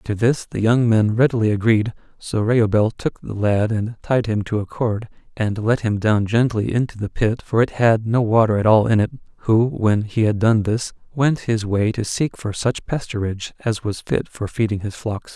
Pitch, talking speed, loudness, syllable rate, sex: 110 Hz, 220 wpm, -20 LUFS, 4.8 syllables/s, male